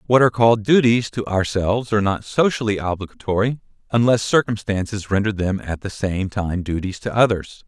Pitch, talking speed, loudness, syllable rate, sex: 105 Hz, 165 wpm, -20 LUFS, 5.6 syllables/s, male